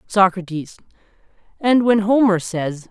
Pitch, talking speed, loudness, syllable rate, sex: 195 Hz, 105 wpm, -18 LUFS, 4.1 syllables/s, male